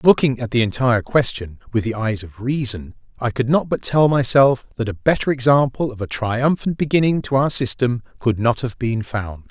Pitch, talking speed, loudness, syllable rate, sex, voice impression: 125 Hz, 200 wpm, -19 LUFS, 5.2 syllables/s, male, very masculine, middle-aged, tensed, slightly powerful, bright, soft, clear, fluent, slightly raspy, cool, intellectual, refreshing, sincere, calm, very mature, friendly, reassuring, very unique, slightly elegant, wild, sweet, slightly lively, kind, slightly modest